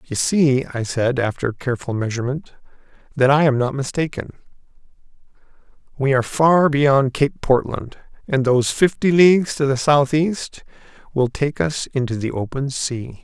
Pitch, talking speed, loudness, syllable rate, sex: 135 Hz, 145 wpm, -19 LUFS, 4.8 syllables/s, male